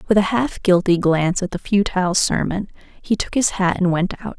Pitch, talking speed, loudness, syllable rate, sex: 190 Hz, 220 wpm, -19 LUFS, 5.6 syllables/s, female